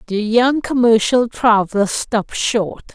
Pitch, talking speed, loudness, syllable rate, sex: 225 Hz, 120 wpm, -16 LUFS, 4.1 syllables/s, female